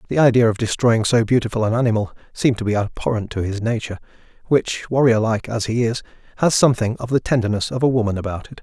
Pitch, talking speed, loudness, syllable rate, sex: 115 Hz, 215 wpm, -19 LUFS, 6.7 syllables/s, male